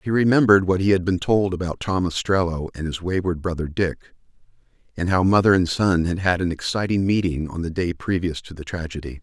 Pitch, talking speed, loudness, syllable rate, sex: 90 Hz, 210 wpm, -21 LUFS, 5.8 syllables/s, male